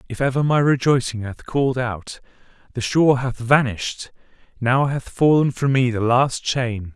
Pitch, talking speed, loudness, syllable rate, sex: 125 Hz, 155 wpm, -20 LUFS, 4.7 syllables/s, male